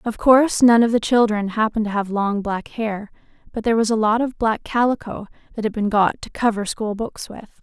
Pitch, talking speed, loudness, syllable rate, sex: 220 Hz, 230 wpm, -19 LUFS, 5.4 syllables/s, female